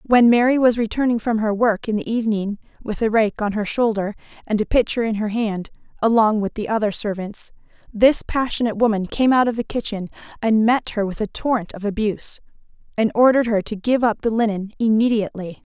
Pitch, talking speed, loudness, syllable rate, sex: 220 Hz, 200 wpm, -20 LUFS, 5.8 syllables/s, female